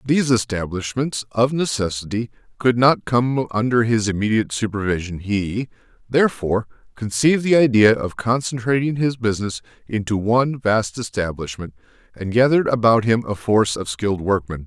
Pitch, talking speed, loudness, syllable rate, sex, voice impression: 110 Hz, 135 wpm, -20 LUFS, 5.4 syllables/s, male, very masculine, adult-like, thick, sincere, calm, slightly mature, slightly wild